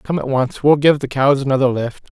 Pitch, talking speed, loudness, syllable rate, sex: 135 Hz, 245 wpm, -16 LUFS, 5.3 syllables/s, male